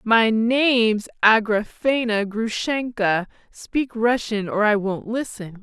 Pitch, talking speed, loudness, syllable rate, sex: 220 Hz, 105 wpm, -21 LUFS, 3.5 syllables/s, female